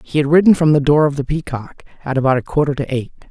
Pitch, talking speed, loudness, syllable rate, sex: 145 Hz, 270 wpm, -16 LUFS, 6.9 syllables/s, male